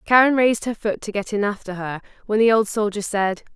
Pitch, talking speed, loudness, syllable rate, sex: 210 Hz, 235 wpm, -21 LUFS, 5.8 syllables/s, female